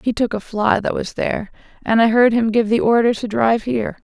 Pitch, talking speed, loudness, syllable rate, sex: 225 Hz, 250 wpm, -18 LUFS, 5.9 syllables/s, female